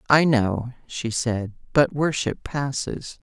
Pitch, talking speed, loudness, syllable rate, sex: 130 Hz, 125 wpm, -23 LUFS, 3.5 syllables/s, female